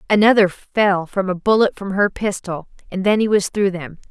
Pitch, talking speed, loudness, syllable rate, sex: 195 Hz, 205 wpm, -18 LUFS, 5.0 syllables/s, female